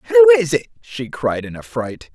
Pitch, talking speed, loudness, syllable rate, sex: 105 Hz, 195 wpm, -17 LUFS, 4.4 syllables/s, male